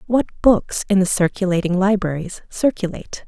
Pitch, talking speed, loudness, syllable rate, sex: 195 Hz, 130 wpm, -19 LUFS, 5.2 syllables/s, female